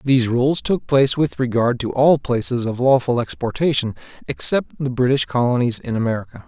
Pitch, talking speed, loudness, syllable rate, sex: 130 Hz, 165 wpm, -19 LUFS, 5.5 syllables/s, male